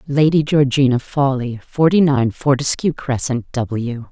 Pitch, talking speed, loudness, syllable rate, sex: 135 Hz, 115 wpm, -17 LUFS, 4.1 syllables/s, female